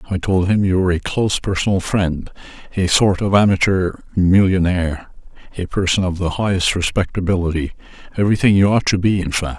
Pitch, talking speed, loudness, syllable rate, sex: 90 Hz, 165 wpm, -17 LUFS, 5.8 syllables/s, male